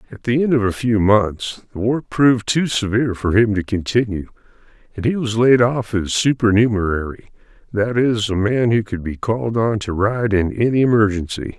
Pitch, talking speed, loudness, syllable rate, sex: 110 Hz, 185 wpm, -18 LUFS, 5.2 syllables/s, male